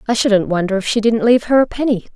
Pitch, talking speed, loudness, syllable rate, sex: 220 Hz, 280 wpm, -15 LUFS, 6.8 syllables/s, female